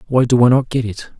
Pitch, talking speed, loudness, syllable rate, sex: 125 Hz, 300 wpm, -15 LUFS, 6.1 syllables/s, male